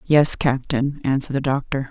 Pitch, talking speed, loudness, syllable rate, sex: 135 Hz, 155 wpm, -20 LUFS, 5.1 syllables/s, female